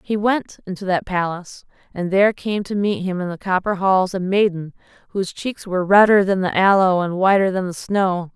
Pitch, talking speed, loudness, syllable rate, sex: 190 Hz, 210 wpm, -19 LUFS, 5.3 syllables/s, female